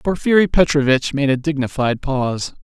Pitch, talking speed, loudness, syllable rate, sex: 140 Hz, 135 wpm, -17 LUFS, 5.3 syllables/s, male